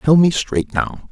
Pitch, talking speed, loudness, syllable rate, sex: 145 Hz, 215 wpm, -17 LUFS, 4.0 syllables/s, male